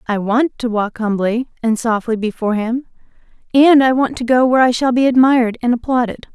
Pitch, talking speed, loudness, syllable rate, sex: 240 Hz, 200 wpm, -15 LUFS, 5.6 syllables/s, female